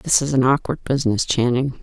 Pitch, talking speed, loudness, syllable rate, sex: 130 Hz, 195 wpm, -19 LUFS, 5.6 syllables/s, female